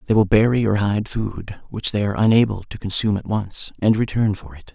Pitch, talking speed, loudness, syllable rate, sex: 105 Hz, 230 wpm, -20 LUFS, 5.8 syllables/s, male